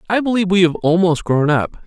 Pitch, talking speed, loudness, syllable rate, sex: 180 Hz, 225 wpm, -16 LUFS, 6.1 syllables/s, male